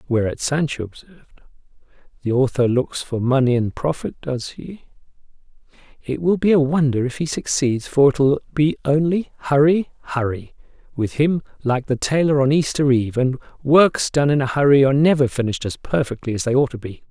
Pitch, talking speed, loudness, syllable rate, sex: 135 Hz, 180 wpm, -19 LUFS, 5.6 syllables/s, male